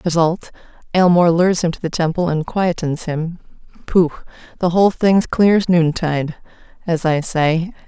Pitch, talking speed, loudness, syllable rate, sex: 170 Hz, 135 wpm, -17 LUFS, 4.8 syllables/s, female